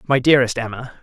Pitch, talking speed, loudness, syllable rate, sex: 125 Hz, 175 wpm, -17 LUFS, 7.0 syllables/s, male